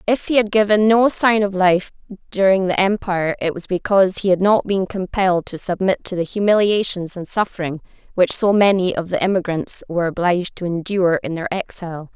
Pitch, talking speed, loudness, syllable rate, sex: 190 Hz, 190 wpm, -18 LUFS, 5.7 syllables/s, female